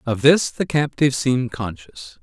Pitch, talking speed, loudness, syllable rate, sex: 125 Hz, 160 wpm, -19 LUFS, 4.8 syllables/s, male